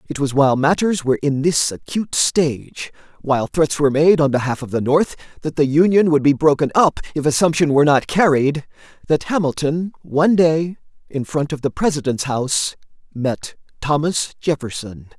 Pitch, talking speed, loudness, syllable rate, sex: 150 Hz, 170 wpm, -18 LUFS, 5.3 syllables/s, male